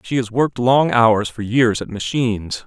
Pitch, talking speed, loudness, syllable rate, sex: 115 Hz, 200 wpm, -17 LUFS, 4.7 syllables/s, male